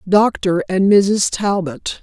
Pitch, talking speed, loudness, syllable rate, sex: 190 Hz, 120 wpm, -16 LUFS, 2.7 syllables/s, female